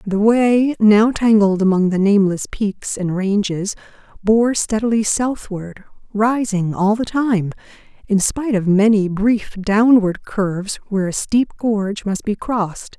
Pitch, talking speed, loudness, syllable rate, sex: 210 Hz, 145 wpm, -17 LUFS, 4.1 syllables/s, female